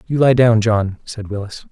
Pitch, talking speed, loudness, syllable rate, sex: 110 Hz, 210 wpm, -16 LUFS, 4.6 syllables/s, male